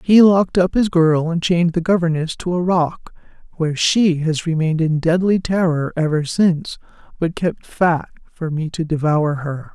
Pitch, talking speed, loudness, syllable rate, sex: 165 Hz, 180 wpm, -18 LUFS, 4.8 syllables/s, female